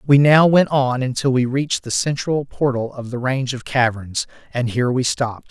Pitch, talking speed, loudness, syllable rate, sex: 130 Hz, 205 wpm, -19 LUFS, 5.3 syllables/s, male